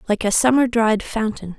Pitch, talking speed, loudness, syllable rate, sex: 225 Hz, 190 wpm, -18 LUFS, 5.0 syllables/s, female